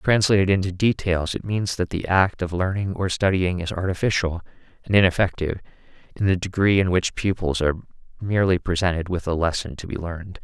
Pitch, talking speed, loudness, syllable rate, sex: 90 Hz, 180 wpm, -22 LUFS, 5.9 syllables/s, male